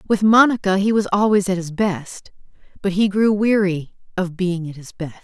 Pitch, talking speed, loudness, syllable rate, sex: 190 Hz, 195 wpm, -18 LUFS, 4.9 syllables/s, female